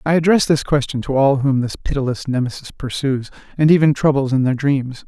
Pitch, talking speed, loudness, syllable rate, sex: 140 Hz, 200 wpm, -17 LUFS, 5.5 syllables/s, male